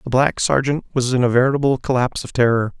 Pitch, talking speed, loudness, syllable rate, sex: 125 Hz, 215 wpm, -18 LUFS, 6.6 syllables/s, male